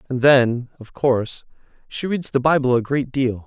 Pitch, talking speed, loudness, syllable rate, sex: 130 Hz, 190 wpm, -19 LUFS, 4.7 syllables/s, male